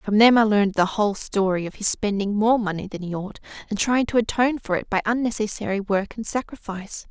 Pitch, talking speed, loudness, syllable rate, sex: 210 Hz, 220 wpm, -22 LUFS, 6.0 syllables/s, female